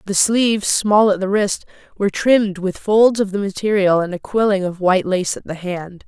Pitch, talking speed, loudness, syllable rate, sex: 195 Hz, 215 wpm, -17 LUFS, 5.2 syllables/s, female